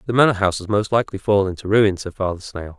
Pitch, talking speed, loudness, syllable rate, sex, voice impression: 100 Hz, 260 wpm, -19 LUFS, 6.8 syllables/s, male, masculine, adult-like, slightly relaxed, slightly soft, muffled, slightly raspy, cool, intellectual, calm, friendly, slightly wild, kind, slightly modest